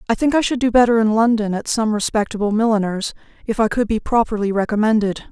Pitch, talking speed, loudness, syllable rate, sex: 220 Hz, 205 wpm, -18 LUFS, 6.3 syllables/s, female